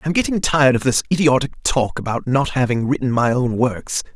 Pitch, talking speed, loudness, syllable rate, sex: 135 Hz, 200 wpm, -18 LUFS, 5.4 syllables/s, male